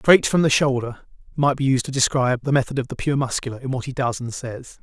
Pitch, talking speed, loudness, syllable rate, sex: 130 Hz, 260 wpm, -21 LUFS, 6.0 syllables/s, male